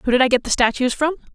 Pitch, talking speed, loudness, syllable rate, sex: 265 Hz, 310 wpm, -18 LUFS, 7.1 syllables/s, female